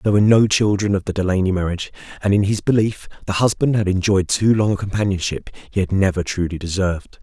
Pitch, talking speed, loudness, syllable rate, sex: 95 Hz, 210 wpm, -19 LUFS, 6.5 syllables/s, male